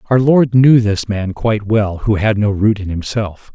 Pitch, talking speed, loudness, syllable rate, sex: 105 Hz, 220 wpm, -14 LUFS, 4.4 syllables/s, male